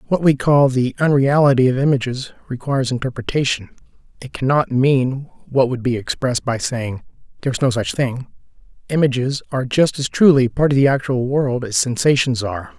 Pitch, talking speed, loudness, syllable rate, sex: 130 Hz, 165 wpm, -18 LUFS, 5.5 syllables/s, male